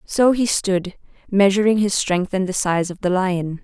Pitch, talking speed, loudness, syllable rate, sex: 190 Hz, 200 wpm, -19 LUFS, 4.4 syllables/s, female